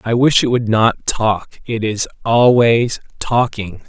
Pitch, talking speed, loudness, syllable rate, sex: 115 Hz, 155 wpm, -15 LUFS, 3.6 syllables/s, male